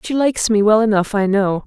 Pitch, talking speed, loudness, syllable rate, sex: 215 Hz, 250 wpm, -16 LUFS, 5.8 syllables/s, female